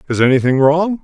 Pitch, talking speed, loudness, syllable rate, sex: 150 Hz, 175 wpm, -13 LUFS, 6.0 syllables/s, male